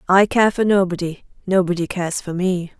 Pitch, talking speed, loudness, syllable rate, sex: 185 Hz, 170 wpm, -19 LUFS, 7.3 syllables/s, female